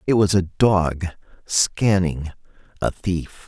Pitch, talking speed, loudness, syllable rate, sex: 90 Hz, 120 wpm, -21 LUFS, 3.4 syllables/s, male